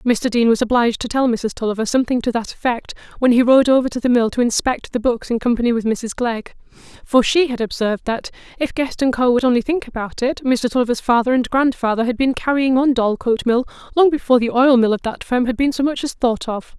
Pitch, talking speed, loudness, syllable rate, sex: 245 Hz, 245 wpm, -18 LUFS, 6.1 syllables/s, female